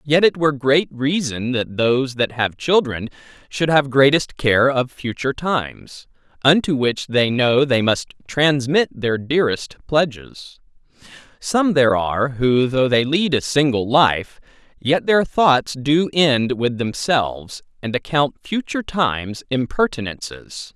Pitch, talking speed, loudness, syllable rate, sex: 135 Hz, 140 wpm, -18 LUFS, 4.2 syllables/s, male